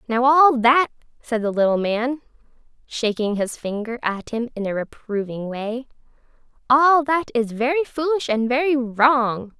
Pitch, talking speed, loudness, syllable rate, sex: 245 Hz, 145 wpm, -20 LUFS, 4.3 syllables/s, female